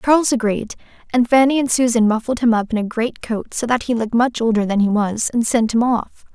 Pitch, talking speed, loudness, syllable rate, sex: 230 Hz, 235 wpm, -18 LUFS, 5.7 syllables/s, female